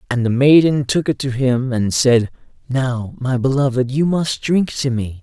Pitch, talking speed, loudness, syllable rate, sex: 130 Hz, 195 wpm, -17 LUFS, 4.3 syllables/s, male